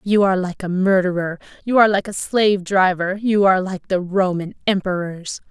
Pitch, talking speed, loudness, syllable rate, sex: 190 Hz, 165 wpm, -18 LUFS, 5.4 syllables/s, female